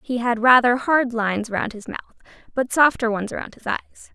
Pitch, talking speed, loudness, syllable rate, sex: 240 Hz, 205 wpm, -20 LUFS, 6.1 syllables/s, female